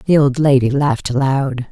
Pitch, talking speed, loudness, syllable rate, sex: 135 Hz, 175 wpm, -15 LUFS, 4.8 syllables/s, female